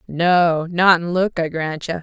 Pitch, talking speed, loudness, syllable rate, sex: 170 Hz, 205 wpm, -18 LUFS, 3.8 syllables/s, female